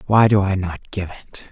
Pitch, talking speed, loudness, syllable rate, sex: 95 Hz, 235 wpm, -19 LUFS, 5.6 syllables/s, male